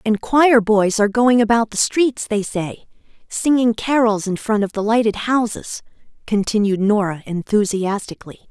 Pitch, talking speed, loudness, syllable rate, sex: 215 Hz, 150 wpm, -18 LUFS, 4.6 syllables/s, female